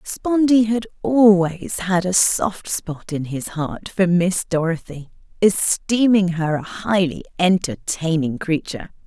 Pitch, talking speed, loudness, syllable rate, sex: 185 Hz, 125 wpm, -19 LUFS, 3.8 syllables/s, female